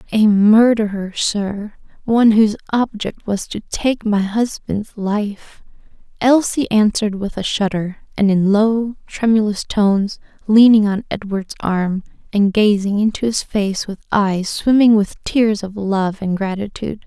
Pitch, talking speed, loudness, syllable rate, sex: 210 Hz, 140 wpm, -17 LUFS, 4.2 syllables/s, female